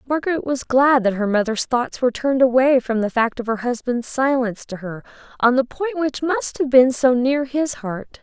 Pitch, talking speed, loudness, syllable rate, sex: 255 Hz, 220 wpm, -19 LUFS, 5.1 syllables/s, female